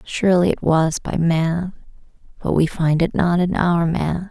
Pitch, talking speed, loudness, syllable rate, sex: 170 Hz, 180 wpm, -19 LUFS, 4.2 syllables/s, female